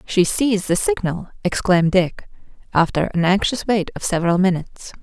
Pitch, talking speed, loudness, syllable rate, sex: 190 Hz, 155 wpm, -19 LUFS, 5.3 syllables/s, female